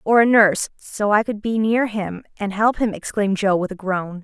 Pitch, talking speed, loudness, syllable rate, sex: 205 Hz, 240 wpm, -20 LUFS, 5.1 syllables/s, female